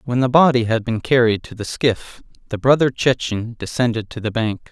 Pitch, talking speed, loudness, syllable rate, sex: 120 Hz, 205 wpm, -18 LUFS, 5.1 syllables/s, male